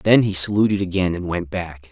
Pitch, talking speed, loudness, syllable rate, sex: 90 Hz, 220 wpm, -20 LUFS, 5.6 syllables/s, male